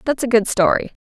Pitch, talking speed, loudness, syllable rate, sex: 230 Hz, 235 wpm, -17 LUFS, 6.2 syllables/s, female